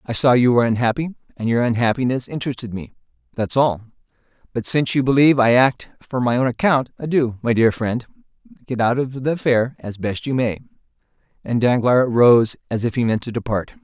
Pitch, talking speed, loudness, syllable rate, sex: 125 Hz, 190 wpm, -19 LUFS, 5.8 syllables/s, male